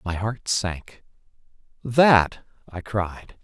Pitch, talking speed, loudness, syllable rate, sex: 105 Hz, 105 wpm, -22 LUFS, 2.6 syllables/s, male